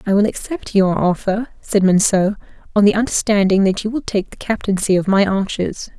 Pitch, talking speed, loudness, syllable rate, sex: 200 Hz, 190 wpm, -17 LUFS, 5.3 syllables/s, female